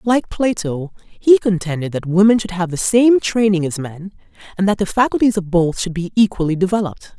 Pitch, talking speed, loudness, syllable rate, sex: 190 Hz, 190 wpm, -17 LUFS, 5.4 syllables/s, female